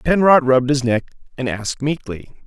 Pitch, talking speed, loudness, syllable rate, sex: 135 Hz, 170 wpm, -17 LUFS, 5.6 syllables/s, male